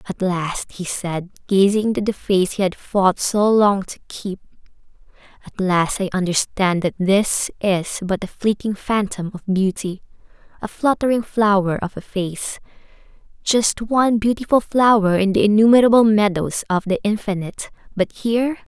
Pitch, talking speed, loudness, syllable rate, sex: 200 Hz, 140 wpm, -19 LUFS, 4.7 syllables/s, female